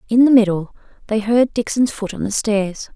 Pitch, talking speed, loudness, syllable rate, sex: 220 Hz, 205 wpm, -17 LUFS, 5.0 syllables/s, female